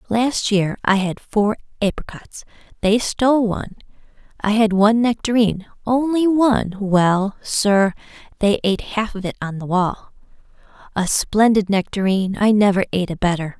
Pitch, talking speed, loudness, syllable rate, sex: 210 Hz, 130 wpm, -18 LUFS, 4.9 syllables/s, female